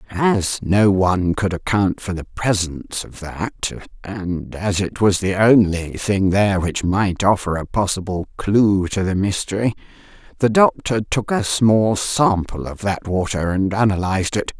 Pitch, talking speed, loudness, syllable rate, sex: 100 Hz, 160 wpm, -19 LUFS, 4.2 syllables/s, female